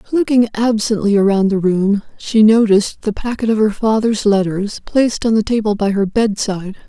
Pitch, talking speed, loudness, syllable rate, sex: 210 Hz, 175 wpm, -15 LUFS, 5.1 syllables/s, female